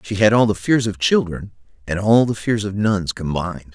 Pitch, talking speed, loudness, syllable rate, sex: 100 Hz, 225 wpm, -19 LUFS, 5.1 syllables/s, male